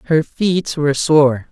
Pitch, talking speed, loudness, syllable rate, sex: 150 Hz, 160 wpm, -15 LUFS, 3.9 syllables/s, male